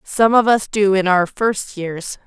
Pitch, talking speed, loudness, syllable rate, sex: 200 Hz, 210 wpm, -16 LUFS, 3.8 syllables/s, female